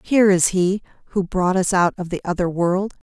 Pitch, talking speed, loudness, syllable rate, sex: 185 Hz, 215 wpm, -20 LUFS, 5.3 syllables/s, female